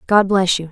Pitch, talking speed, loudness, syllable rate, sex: 190 Hz, 250 wpm, -15 LUFS, 5.3 syllables/s, female